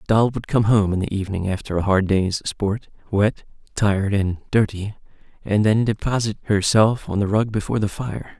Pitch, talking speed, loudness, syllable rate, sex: 105 Hz, 185 wpm, -21 LUFS, 5.1 syllables/s, male